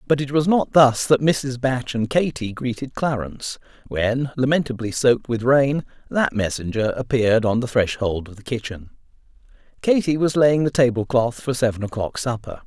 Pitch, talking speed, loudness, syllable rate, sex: 125 Hz, 170 wpm, -21 LUFS, 5.0 syllables/s, male